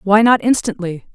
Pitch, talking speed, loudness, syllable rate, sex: 205 Hz, 155 wpm, -15 LUFS, 5.0 syllables/s, female